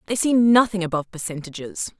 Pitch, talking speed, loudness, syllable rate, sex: 190 Hz, 150 wpm, -21 LUFS, 6.3 syllables/s, female